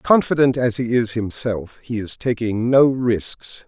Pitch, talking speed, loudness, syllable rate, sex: 120 Hz, 165 wpm, -19 LUFS, 3.9 syllables/s, male